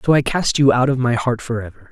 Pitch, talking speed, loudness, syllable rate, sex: 125 Hz, 315 wpm, -18 LUFS, 6.2 syllables/s, male